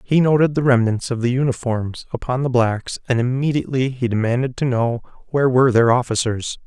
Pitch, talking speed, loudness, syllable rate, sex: 125 Hz, 180 wpm, -19 LUFS, 5.7 syllables/s, male